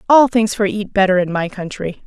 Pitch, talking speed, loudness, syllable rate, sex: 205 Hz, 230 wpm, -16 LUFS, 5.4 syllables/s, female